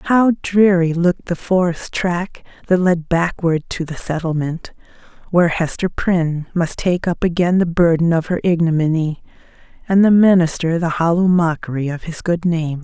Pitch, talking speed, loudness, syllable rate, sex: 170 Hz, 160 wpm, -17 LUFS, 4.7 syllables/s, female